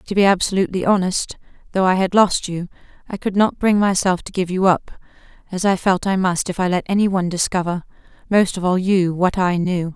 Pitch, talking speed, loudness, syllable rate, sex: 185 Hz, 195 wpm, -18 LUFS, 5.7 syllables/s, female